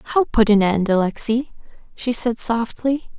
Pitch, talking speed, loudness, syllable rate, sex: 230 Hz, 150 wpm, -19 LUFS, 4.6 syllables/s, female